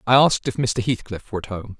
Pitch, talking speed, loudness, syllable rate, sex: 110 Hz, 270 wpm, -22 LUFS, 6.7 syllables/s, male